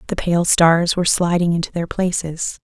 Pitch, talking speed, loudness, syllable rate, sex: 170 Hz, 180 wpm, -18 LUFS, 5.0 syllables/s, female